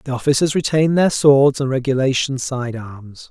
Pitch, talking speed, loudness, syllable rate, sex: 135 Hz, 165 wpm, -17 LUFS, 4.7 syllables/s, male